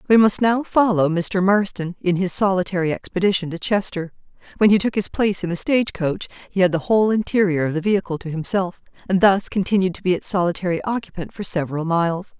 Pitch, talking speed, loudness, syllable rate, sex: 185 Hz, 200 wpm, -20 LUFS, 6.1 syllables/s, female